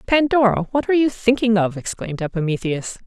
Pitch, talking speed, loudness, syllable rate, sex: 210 Hz, 155 wpm, -19 LUFS, 6.0 syllables/s, female